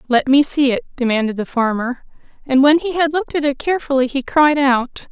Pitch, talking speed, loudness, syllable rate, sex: 275 Hz, 210 wpm, -16 LUFS, 5.7 syllables/s, female